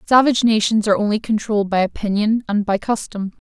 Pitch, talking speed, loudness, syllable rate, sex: 215 Hz, 175 wpm, -18 LUFS, 6.3 syllables/s, female